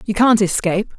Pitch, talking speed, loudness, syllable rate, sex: 210 Hz, 185 wpm, -16 LUFS, 5.6 syllables/s, female